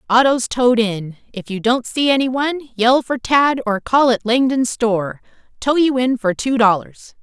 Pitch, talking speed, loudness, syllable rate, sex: 240 Hz, 200 wpm, -17 LUFS, 5.0 syllables/s, female